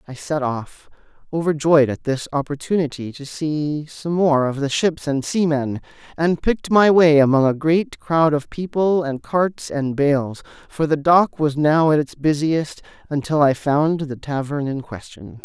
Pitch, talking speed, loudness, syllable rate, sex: 150 Hz, 175 wpm, -19 LUFS, 4.2 syllables/s, male